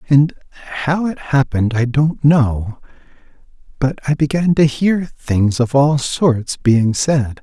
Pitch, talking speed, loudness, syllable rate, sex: 140 Hz, 145 wpm, -16 LUFS, 3.7 syllables/s, male